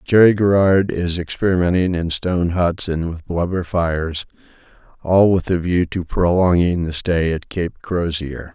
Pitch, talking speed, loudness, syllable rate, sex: 85 Hz, 145 wpm, -18 LUFS, 4.5 syllables/s, male